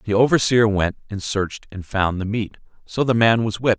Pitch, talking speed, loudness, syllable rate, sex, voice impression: 105 Hz, 220 wpm, -20 LUFS, 5.4 syllables/s, male, very masculine, very adult-like, slightly middle-aged, very thick, tensed, powerful, bright, slightly soft, clear, fluent, cool, very intellectual, refreshing, very sincere, very calm, slightly mature, very friendly, very reassuring, slightly unique, very elegant, slightly wild, very sweet, very lively, kind, slightly modest